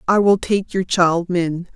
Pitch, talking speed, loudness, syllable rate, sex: 180 Hz, 205 wpm, -18 LUFS, 3.8 syllables/s, female